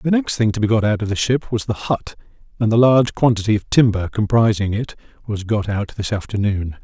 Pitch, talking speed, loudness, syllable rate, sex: 110 Hz, 230 wpm, -18 LUFS, 5.7 syllables/s, male